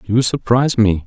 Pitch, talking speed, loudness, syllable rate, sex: 115 Hz, 170 wpm, -16 LUFS, 5.4 syllables/s, male